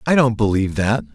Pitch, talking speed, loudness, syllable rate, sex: 110 Hz, 210 wpm, -18 LUFS, 6.3 syllables/s, male